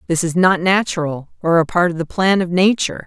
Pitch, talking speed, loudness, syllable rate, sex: 175 Hz, 235 wpm, -16 LUFS, 5.7 syllables/s, female